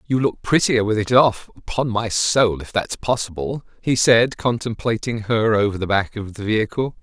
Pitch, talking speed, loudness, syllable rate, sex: 110 Hz, 190 wpm, -20 LUFS, 4.8 syllables/s, male